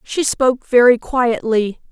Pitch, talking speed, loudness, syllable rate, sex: 245 Hz, 125 wpm, -15 LUFS, 4.1 syllables/s, female